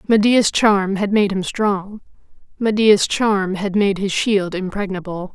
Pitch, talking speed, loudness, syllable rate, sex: 200 Hz, 145 wpm, -18 LUFS, 3.9 syllables/s, female